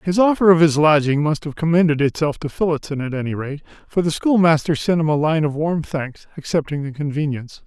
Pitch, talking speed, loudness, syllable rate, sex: 155 Hz, 210 wpm, -19 LUFS, 5.8 syllables/s, male